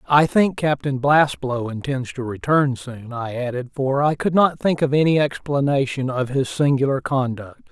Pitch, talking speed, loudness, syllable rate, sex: 135 Hz, 170 wpm, -20 LUFS, 4.6 syllables/s, male